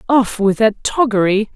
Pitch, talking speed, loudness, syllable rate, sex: 220 Hz, 155 wpm, -15 LUFS, 4.7 syllables/s, female